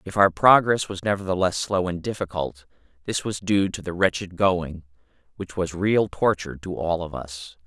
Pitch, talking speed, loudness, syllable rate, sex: 90 Hz, 180 wpm, -23 LUFS, 4.9 syllables/s, male